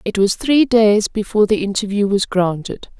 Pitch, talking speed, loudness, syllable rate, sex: 210 Hz, 180 wpm, -16 LUFS, 4.9 syllables/s, female